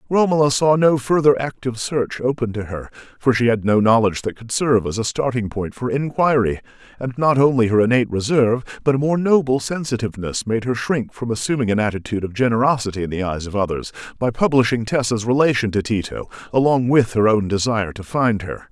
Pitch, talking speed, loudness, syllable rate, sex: 120 Hz, 200 wpm, -19 LUFS, 6.0 syllables/s, male